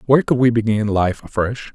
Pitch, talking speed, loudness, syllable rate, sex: 115 Hz, 205 wpm, -18 LUFS, 5.6 syllables/s, male